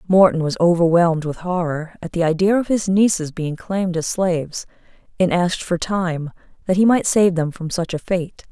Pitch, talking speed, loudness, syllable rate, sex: 175 Hz, 195 wpm, -19 LUFS, 5.2 syllables/s, female